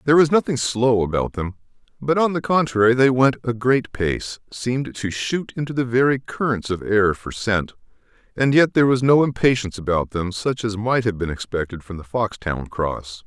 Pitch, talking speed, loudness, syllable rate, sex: 115 Hz, 200 wpm, -20 LUFS, 5.1 syllables/s, male